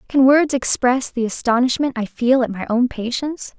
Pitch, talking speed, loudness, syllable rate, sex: 250 Hz, 185 wpm, -18 LUFS, 5.1 syllables/s, female